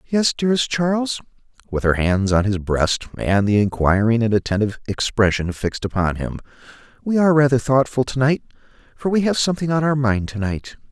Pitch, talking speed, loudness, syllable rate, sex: 125 Hz, 180 wpm, -19 LUFS, 5.8 syllables/s, male